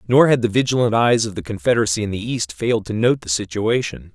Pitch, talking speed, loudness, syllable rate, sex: 110 Hz, 230 wpm, -19 LUFS, 6.3 syllables/s, male